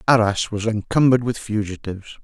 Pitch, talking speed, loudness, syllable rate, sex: 110 Hz, 135 wpm, -20 LUFS, 5.9 syllables/s, male